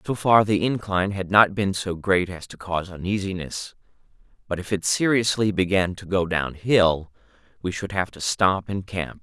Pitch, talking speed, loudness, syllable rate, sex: 95 Hz, 180 wpm, -23 LUFS, 4.8 syllables/s, male